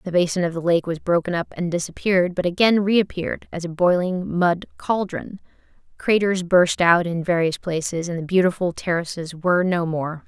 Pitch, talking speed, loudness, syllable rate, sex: 175 Hz, 180 wpm, -21 LUFS, 5.2 syllables/s, female